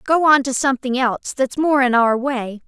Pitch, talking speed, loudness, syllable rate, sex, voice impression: 260 Hz, 225 wpm, -17 LUFS, 5.0 syllables/s, female, feminine, slightly young, tensed, bright, clear, slightly halting, slightly cute, slightly friendly, slightly sharp